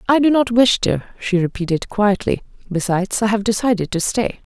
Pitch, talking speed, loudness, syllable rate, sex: 210 Hz, 195 wpm, -18 LUFS, 5.7 syllables/s, female